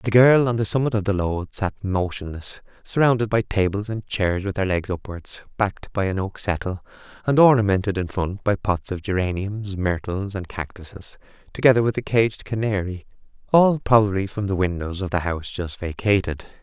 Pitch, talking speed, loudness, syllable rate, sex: 100 Hz, 175 wpm, -22 LUFS, 5.2 syllables/s, male